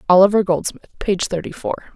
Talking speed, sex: 155 wpm, female